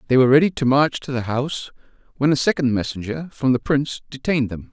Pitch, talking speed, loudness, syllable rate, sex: 130 Hz, 215 wpm, -20 LUFS, 6.6 syllables/s, male